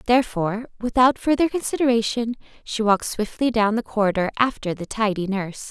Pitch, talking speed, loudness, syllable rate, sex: 225 Hz, 145 wpm, -22 LUFS, 5.9 syllables/s, female